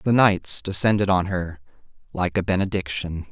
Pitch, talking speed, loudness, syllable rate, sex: 95 Hz, 145 wpm, -22 LUFS, 4.7 syllables/s, male